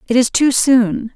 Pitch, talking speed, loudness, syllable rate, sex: 245 Hz, 210 wpm, -14 LUFS, 4.2 syllables/s, female